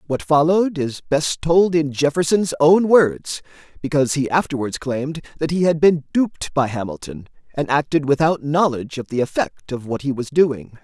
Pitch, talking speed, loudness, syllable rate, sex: 150 Hz, 175 wpm, -19 LUFS, 5.1 syllables/s, male